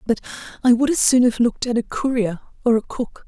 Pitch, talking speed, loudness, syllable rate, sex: 240 Hz, 240 wpm, -19 LUFS, 6.3 syllables/s, female